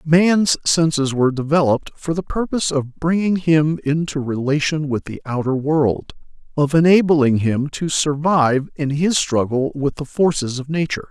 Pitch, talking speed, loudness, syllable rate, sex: 150 Hz, 155 wpm, -18 LUFS, 4.8 syllables/s, male